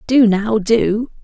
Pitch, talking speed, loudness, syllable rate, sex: 220 Hz, 145 wpm, -15 LUFS, 3.0 syllables/s, female